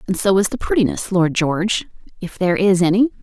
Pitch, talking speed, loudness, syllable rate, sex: 190 Hz, 185 wpm, -18 LUFS, 6.1 syllables/s, female